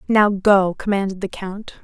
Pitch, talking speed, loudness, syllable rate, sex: 195 Hz, 165 wpm, -19 LUFS, 4.6 syllables/s, female